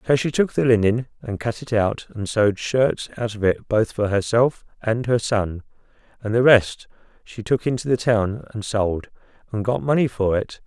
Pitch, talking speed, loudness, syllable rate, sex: 115 Hz, 200 wpm, -21 LUFS, 4.7 syllables/s, male